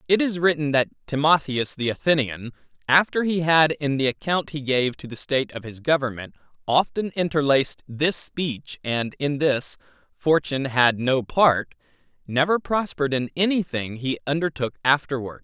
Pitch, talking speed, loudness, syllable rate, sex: 145 Hz, 150 wpm, -22 LUFS, 4.9 syllables/s, male